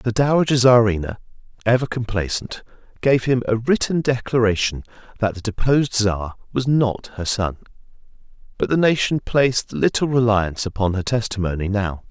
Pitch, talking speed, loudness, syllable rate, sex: 115 Hz, 140 wpm, -20 LUFS, 5.2 syllables/s, male